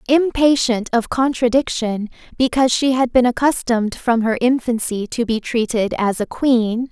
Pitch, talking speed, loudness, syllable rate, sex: 240 Hz, 150 wpm, -18 LUFS, 4.7 syllables/s, female